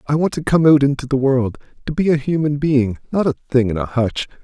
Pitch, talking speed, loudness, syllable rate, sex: 140 Hz, 245 wpm, -17 LUFS, 6.1 syllables/s, male